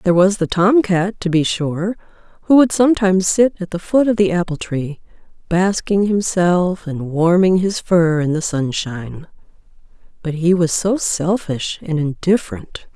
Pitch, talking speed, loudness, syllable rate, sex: 180 Hz, 160 wpm, -17 LUFS, 4.5 syllables/s, female